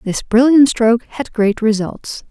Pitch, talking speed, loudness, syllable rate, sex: 230 Hz, 155 wpm, -14 LUFS, 4.3 syllables/s, female